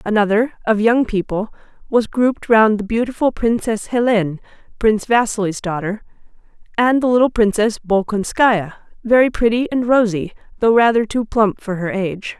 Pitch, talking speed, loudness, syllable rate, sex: 220 Hz, 145 wpm, -17 LUFS, 5.2 syllables/s, female